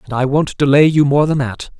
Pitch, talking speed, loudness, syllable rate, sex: 140 Hz, 270 wpm, -14 LUFS, 5.4 syllables/s, male